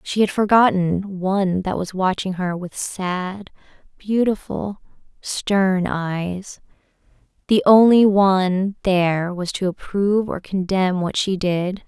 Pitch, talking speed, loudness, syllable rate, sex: 190 Hz, 120 wpm, -19 LUFS, 3.7 syllables/s, female